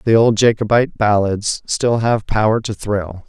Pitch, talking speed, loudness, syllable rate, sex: 110 Hz, 165 wpm, -16 LUFS, 4.6 syllables/s, male